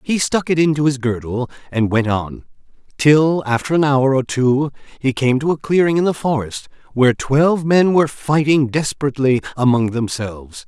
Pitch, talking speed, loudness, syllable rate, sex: 135 Hz, 175 wpm, -17 LUFS, 5.1 syllables/s, male